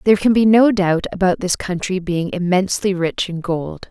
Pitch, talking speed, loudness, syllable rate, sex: 185 Hz, 200 wpm, -17 LUFS, 5.1 syllables/s, female